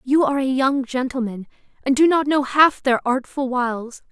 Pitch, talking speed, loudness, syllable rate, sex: 265 Hz, 190 wpm, -19 LUFS, 5.1 syllables/s, female